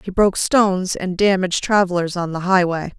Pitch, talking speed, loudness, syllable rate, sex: 185 Hz, 180 wpm, -18 LUFS, 5.6 syllables/s, female